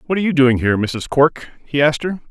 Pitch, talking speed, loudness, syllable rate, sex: 145 Hz, 260 wpm, -17 LUFS, 6.5 syllables/s, male